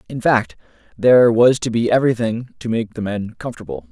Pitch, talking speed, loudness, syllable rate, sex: 115 Hz, 185 wpm, -17 LUFS, 5.8 syllables/s, male